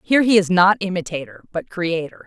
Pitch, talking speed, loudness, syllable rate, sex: 180 Hz, 185 wpm, -19 LUFS, 5.7 syllables/s, female